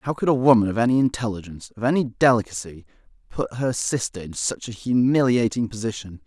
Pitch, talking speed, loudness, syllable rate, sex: 115 Hz, 170 wpm, -22 LUFS, 5.9 syllables/s, male